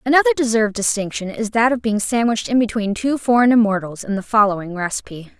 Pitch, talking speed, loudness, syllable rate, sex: 220 Hz, 190 wpm, -18 LUFS, 6.5 syllables/s, female